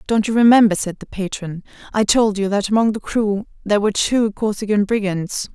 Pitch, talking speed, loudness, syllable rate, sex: 210 Hz, 195 wpm, -18 LUFS, 5.5 syllables/s, female